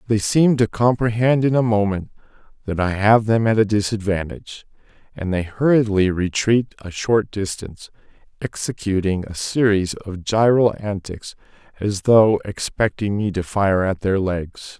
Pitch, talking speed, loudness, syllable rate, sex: 105 Hz, 145 wpm, -19 LUFS, 4.5 syllables/s, male